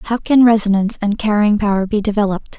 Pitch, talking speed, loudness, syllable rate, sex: 210 Hz, 185 wpm, -15 LUFS, 6.3 syllables/s, female